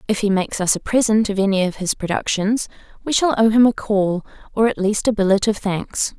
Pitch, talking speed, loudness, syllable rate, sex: 205 Hz, 235 wpm, -19 LUFS, 5.6 syllables/s, female